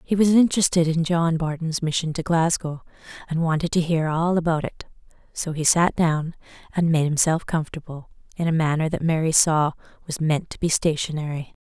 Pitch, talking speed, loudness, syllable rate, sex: 160 Hz, 180 wpm, -22 LUFS, 5.4 syllables/s, female